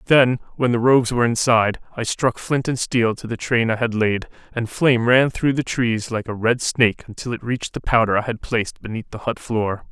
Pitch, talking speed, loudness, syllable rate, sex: 115 Hz, 235 wpm, -20 LUFS, 5.6 syllables/s, male